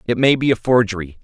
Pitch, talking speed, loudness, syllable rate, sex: 115 Hz, 245 wpm, -17 LUFS, 6.3 syllables/s, male